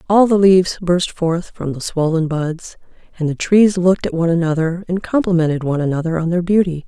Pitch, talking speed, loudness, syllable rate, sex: 175 Hz, 200 wpm, -17 LUFS, 5.8 syllables/s, female